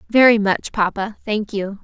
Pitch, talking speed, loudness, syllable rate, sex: 210 Hz, 165 wpm, -18 LUFS, 4.4 syllables/s, female